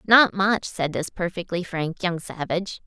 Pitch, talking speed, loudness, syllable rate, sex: 180 Hz, 165 wpm, -24 LUFS, 4.4 syllables/s, female